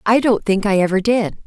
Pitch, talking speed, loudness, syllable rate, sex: 205 Hz, 245 wpm, -17 LUFS, 5.4 syllables/s, female